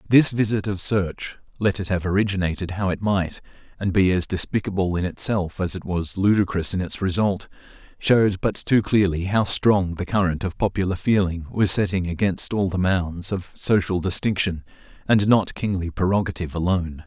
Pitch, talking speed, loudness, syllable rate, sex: 95 Hz, 170 wpm, -22 LUFS, 5.2 syllables/s, male